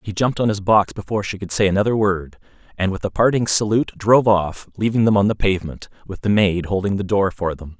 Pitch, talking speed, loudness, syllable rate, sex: 100 Hz, 240 wpm, -19 LUFS, 6.3 syllables/s, male